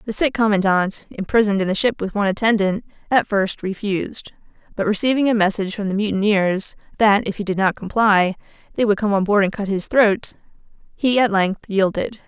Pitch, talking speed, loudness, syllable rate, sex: 205 Hz, 190 wpm, -19 LUFS, 5.6 syllables/s, female